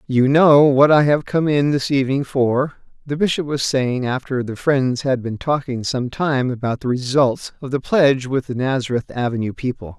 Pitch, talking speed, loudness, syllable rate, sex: 135 Hz, 200 wpm, -18 LUFS, 4.8 syllables/s, male